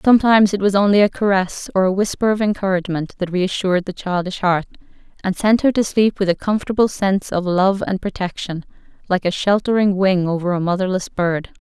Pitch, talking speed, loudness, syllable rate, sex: 190 Hz, 195 wpm, -18 LUFS, 6.1 syllables/s, female